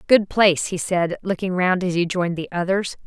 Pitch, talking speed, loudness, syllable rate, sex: 185 Hz, 215 wpm, -21 LUFS, 5.5 syllables/s, female